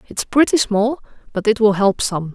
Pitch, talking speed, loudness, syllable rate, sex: 215 Hz, 205 wpm, -17 LUFS, 4.7 syllables/s, female